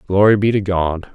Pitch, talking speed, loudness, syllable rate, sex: 95 Hz, 210 wpm, -16 LUFS, 5.1 syllables/s, male